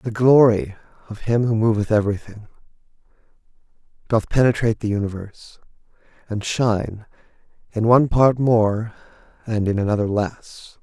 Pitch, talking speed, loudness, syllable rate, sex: 110 Hz, 115 wpm, -19 LUFS, 5.1 syllables/s, male